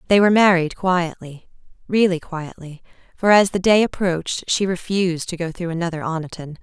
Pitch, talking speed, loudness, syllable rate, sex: 175 Hz, 155 wpm, -19 LUFS, 5.5 syllables/s, female